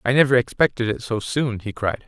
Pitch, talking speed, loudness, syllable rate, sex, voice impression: 120 Hz, 230 wpm, -21 LUFS, 5.6 syllables/s, male, very masculine, adult-like, slightly middle-aged, slightly thick, slightly tensed, slightly weak, slightly dark, very hard, slightly muffled, slightly halting, slightly raspy, slightly cool, slightly intellectual, sincere, slightly calm, slightly mature, slightly friendly, slightly reassuring, unique, slightly wild, modest